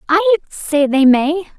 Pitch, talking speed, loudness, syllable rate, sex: 325 Hz, 150 wpm, -14 LUFS, 3.6 syllables/s, female